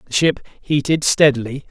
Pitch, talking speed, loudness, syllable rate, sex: 140 Hz, 140 wpm, -17 LUFS, 4.9 syllables/s, male